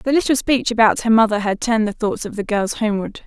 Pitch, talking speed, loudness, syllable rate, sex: 220 Hz, 260 wpm, -18 LUFS, 6.2 syllables/s, female